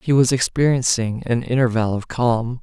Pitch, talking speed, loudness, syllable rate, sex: 120 Hz, 160 wpm, -19 LUFS, 4.8 syllables/s, male